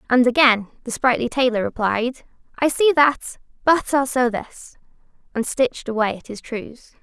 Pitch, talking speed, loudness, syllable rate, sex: 250 Hz, 160 wpm, -20 LUFS, 4.7 syllables/s, female